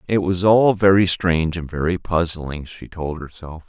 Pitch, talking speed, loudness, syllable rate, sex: 85 Hz, 180 wpm, -19 LUFS, 4.6 syllables/s, male